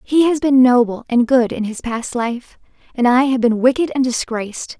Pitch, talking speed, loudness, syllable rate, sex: 250 Hz, 215 wpm, -16 LUFS, 4.9 syllables/s, female